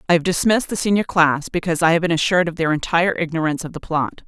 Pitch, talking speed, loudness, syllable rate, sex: 170 Hz, 255 wpm, -19 LUFS, 7.4 syllables/s, female